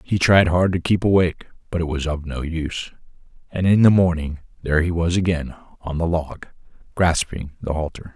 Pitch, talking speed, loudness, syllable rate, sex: 85 Hz, 190 wpm, -20 LUFS, 5.4 syllables/s, male